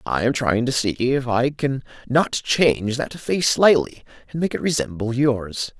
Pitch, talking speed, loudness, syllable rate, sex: 125 Hz, 185 wpm, -21 LUFS, 4.3 syllables/s, male